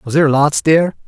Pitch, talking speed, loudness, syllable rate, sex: 140 Hz, 225 wpm, -13 LUFS, 6.4 syllables/s, male